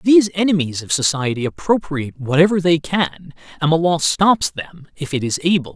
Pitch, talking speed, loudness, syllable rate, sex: 160 Hz, 175 wpm, -18 LUFS, 5.3 syllables/s, male